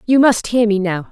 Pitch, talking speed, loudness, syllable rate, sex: 215 Hz, 270 wpm, -15 LUFS, 5.2 syllables/s, female